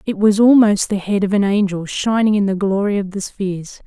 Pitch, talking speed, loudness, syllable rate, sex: 200 Hz, 235 wpm, -16 LUFS, 5.4 syllables/s, female